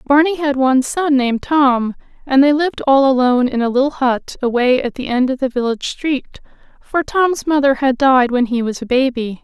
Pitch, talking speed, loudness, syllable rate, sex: 265 Hz, 210 wpm, -16 LUFS, 5.4 syllables/s, female